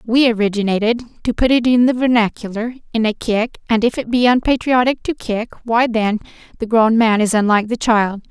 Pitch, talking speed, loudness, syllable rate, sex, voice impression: 230 Hz, 195 wpm, -16 LUFS, 5.4 syllables/s, female, feminine, adult-like, tensed, soft, clear, intellectual, calm, reassuring, slightly strict